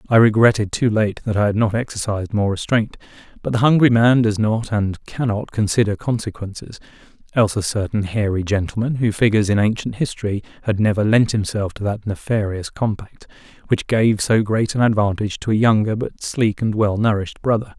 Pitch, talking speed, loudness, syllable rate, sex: 110 Hz, 180 wpm, -19 LUFS, 5.6 syllables/s, male